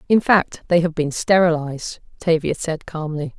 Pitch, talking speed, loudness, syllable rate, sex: 165 Hz, 160 wpm, -20 LUFS, 4.7 syllables/s, female